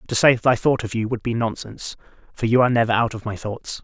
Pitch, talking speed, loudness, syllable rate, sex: 115 Hz, 280 wpm, -21 LUFS, 6.7 syllables/s, male